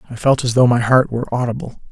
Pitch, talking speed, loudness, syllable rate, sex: 125 Hz, 250 wpm, -16 LUFS, 7.0 syllables/s, male